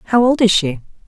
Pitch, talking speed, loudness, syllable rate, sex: 205 Hz, 225 wpm, -15 LUFS, 6.7 syllables/s, female